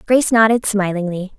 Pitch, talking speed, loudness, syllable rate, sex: 210 Hz, 130 wpm, -16 LUFS, 5.8 syllables/s, female